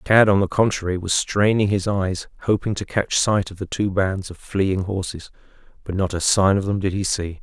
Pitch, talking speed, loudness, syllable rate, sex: 95 Hz, 225 wpm, -21 LUFS, 5.0 syllables/s, male